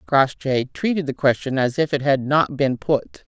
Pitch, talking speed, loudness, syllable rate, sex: 140 Hz, 195 wpm, -20 LUFS, 4.5 syllables/s, female